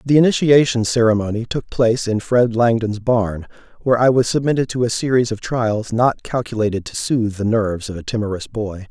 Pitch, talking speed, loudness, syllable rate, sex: 115 Hz, 190 wpm, -18 LUFS, 5.6 syllables/s, male